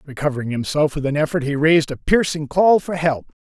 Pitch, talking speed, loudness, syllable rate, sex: 150 Hz, 210 wpm, -19 LUFS, 5.9 syllables/s, male